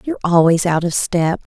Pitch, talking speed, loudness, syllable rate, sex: 175 Hz, 195 wpm, -16 LUFS, 5.5 syllables/s, female